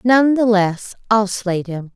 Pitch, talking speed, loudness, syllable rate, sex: 210 Hz, 185 wpm, -17 LUFS, 4.1 syllables/s, female